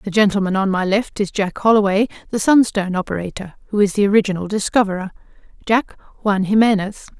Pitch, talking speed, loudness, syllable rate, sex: 205 Hz, 160 wpm, -18 LUFS, 6.4 syllables/s, female